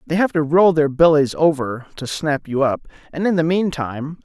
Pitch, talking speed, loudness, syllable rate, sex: 155 Hz, 210 wpm, -18 LUFS, 5.1 syllables/s, male